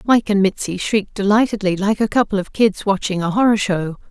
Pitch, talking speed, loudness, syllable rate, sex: 205 Hz, 205 wpm, -18 LUFS, 5.6 syllables/s, female